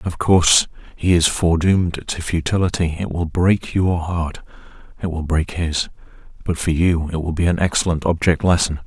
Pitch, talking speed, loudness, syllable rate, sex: 85 Hz, 170 wpm, -19 LUFS, 5.1 syllables/s, male